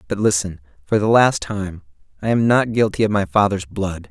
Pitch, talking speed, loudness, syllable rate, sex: 100 Hz, 205 wpm, -18 LUFS, 5.1 syllables/s, male